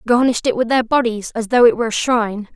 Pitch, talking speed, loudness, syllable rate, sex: 240 Hz, 260 wpm, -16 LUFS, 6.9 syllables/s, female